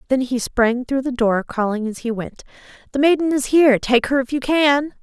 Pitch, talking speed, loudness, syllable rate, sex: 255 Hz, 225 wpm, -18 LUFS, 5.2 syllables/s, female